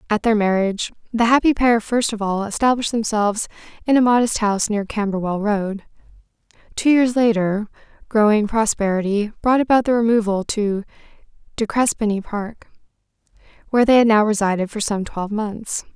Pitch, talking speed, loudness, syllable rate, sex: 215 Hz, 150 wpm, -19 LUFS, 5.5 syllables/s, female